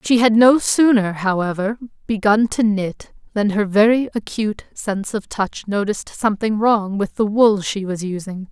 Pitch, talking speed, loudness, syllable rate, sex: 210 Hz, 170 wpm, -18 LUFS, 4.7 syllables/s, female